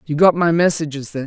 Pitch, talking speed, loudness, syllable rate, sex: 155 Hz, 235 wpm, -17 LUFS, 6.1 syllables/s, female